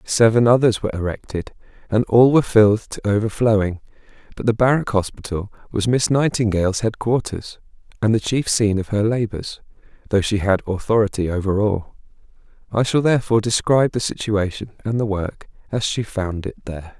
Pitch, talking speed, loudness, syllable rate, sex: 110 Hz, 160 wpm, -19 LUFS, 5.7 syllables/s, male